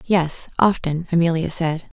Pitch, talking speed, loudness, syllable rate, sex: 165 Hz, 120 wpm, -20 LUFS, 4.1 syllables/s, female